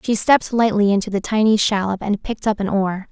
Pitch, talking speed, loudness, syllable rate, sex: 205 Hz, 230 wpm, -18 LUFS, 6.0 syllables/s, female